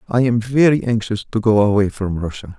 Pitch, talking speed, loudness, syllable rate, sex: 110 Hz, 210 wpm, -17 LUFS, 5.4 syllables/s, male